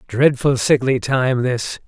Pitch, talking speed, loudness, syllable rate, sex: 130 Hz, 130 wpm, -17 LUFS, 3.6 syllables/s, male